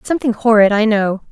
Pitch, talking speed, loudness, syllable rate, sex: 220 Hz, 180 wpm, -14 LUFS, 6.0 syllables/s, female